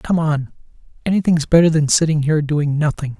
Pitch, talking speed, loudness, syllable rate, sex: 155 Hz, 150 wpm, -17 LUFS, 5.8 syllables/s, male